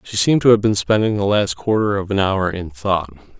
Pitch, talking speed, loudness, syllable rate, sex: 100 Hz, 250 wpm, -17 LUFS, 5.6 syllables/s, male